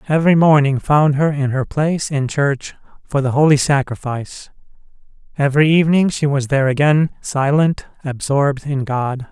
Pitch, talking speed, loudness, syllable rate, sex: 145 Hz, 150 wpm, -16 LUFS, 5.2 syllables/s, male